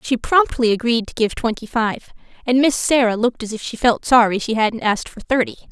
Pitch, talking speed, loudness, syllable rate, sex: 235 Hz, 220 wpm, -18 LUFS, 5.7 syllables/s, female